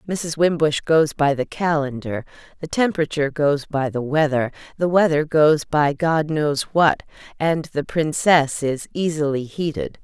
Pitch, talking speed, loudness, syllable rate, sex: 150 Hz, 150 wpm, -20 LUFS, 4.4 syllables/s, female